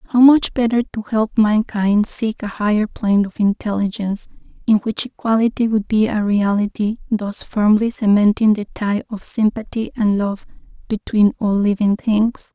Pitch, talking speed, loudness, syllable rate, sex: 215 Hz, 155 wpm, -18 LUFS, 4.7 syllables/s, female